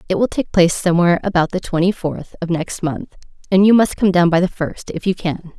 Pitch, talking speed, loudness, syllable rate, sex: 180 Hz, 245 wpm, -17 LUFS, 5.9 syllables/s, female